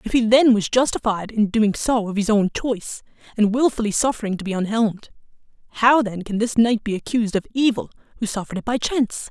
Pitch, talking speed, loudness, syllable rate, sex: 220 Hz, 205 wpm, -20 LUFS, 6.1 syllables/s, female